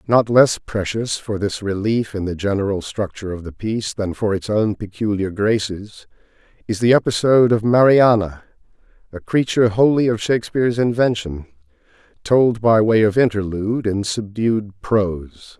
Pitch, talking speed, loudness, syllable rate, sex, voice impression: 105 Hz, 145 wpm, -18 LUFS, 4.9 syllables/s, male, very masculine, slightly old, very thick, very tensed, very powerful, bright, slightly soft, slightly muffled, fluent, raspy, cool, intellectual, refreshing, very sincere, very calm, very friendly, reassuring, very unique, elegant, very wild, sweet, very lively, kind, slightly intense